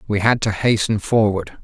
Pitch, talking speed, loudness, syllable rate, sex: 105 Hz, 185 wpm, -18 LUFS, 4.9 syllables/s, male